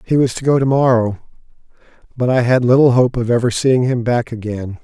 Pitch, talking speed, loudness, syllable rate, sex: 125 Hz, 210 wpm, -15 LUFS, 5.4 syllables/s, male